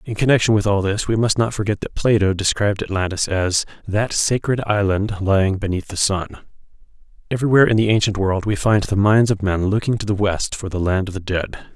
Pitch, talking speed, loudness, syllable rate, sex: 100 Hz, 215 wpm, -19 LUFS, 5.7 syllables/s, male